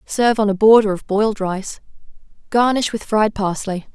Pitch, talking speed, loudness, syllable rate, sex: 210 Hz, 165 wpm, -17 LUFS, 5.1 syllables/s, female